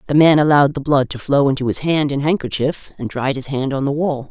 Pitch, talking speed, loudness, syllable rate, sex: 140 Hz, 265 wpm, -17 LUFS, 5.9 syllables/s, female